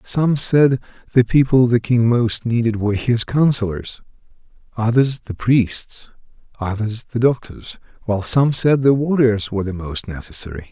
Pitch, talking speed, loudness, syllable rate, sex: 115 Hz, 145 wpm, -18 LUFS, 4.6 syllables/s, male